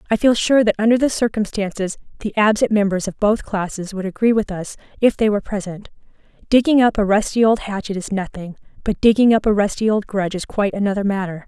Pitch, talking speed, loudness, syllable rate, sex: 205 Hz, 210 wpm, -18 LUFS, 6.2 syllables/s, female